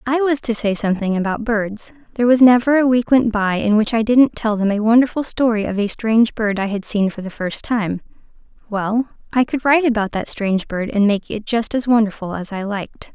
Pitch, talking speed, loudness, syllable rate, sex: 225 Hz, 235 wpm, -18 LUFS, 5.6 syllables/s, female